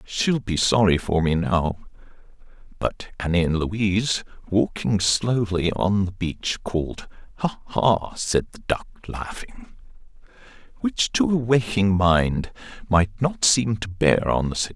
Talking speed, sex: 135 wpm, male